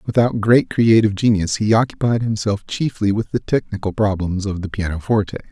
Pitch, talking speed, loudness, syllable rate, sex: 105 Hz, 165 wpm, -18 LUFS, 5.6 syllables/s, male